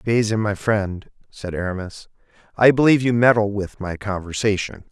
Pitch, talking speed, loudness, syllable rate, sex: 105 Hz, 145 wpm, -20 LUFS, 5.1 syllables/s, male